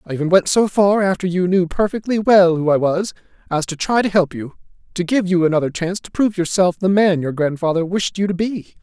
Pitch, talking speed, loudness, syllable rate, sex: 180 Hz, 230 wpm, -17 LUFS, 5.8 syllables/s, male